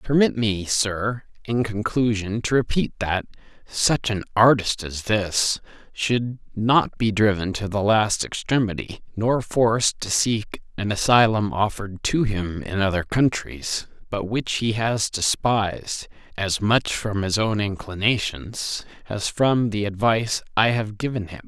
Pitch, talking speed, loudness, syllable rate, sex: 105 Hz, 145 wpm, -22 LUFS, 4.1 syllables/s, male